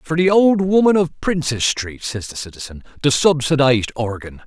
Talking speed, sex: 175 wpm, male